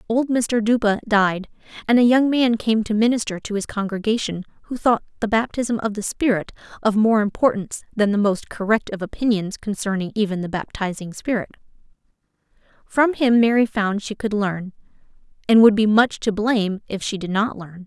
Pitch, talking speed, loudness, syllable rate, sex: 215 Hz, 180 wpm, -20 LUFS, 5.3 syllables/s, female